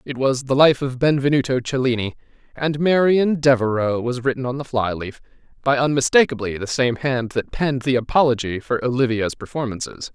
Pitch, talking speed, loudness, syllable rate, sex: 130 Hz, 165 wpm, -20 LUFS, 5.4 syllables/s, male